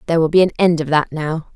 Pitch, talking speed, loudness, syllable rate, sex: 160 Hz, 310 wpm, -16 LUFS, 7.1 syllables/s, female